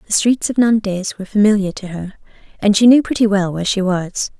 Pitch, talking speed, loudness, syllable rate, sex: 205 Hz, 220 wpm, -16 LUFS, 5.8 syllables/s, female